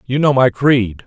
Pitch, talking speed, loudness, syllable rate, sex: 125 Hz, 225 wpm, -14 LUFS, 4.3 syllables/s, male